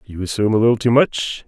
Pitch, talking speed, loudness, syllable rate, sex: 110 Hz, 245 wpm, -17 LUFS, 6.6 syllables/s, male